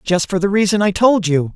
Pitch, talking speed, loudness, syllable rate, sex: 190 Hz, 270 wpm, -15 LUFS, 5.5 syllables/s, male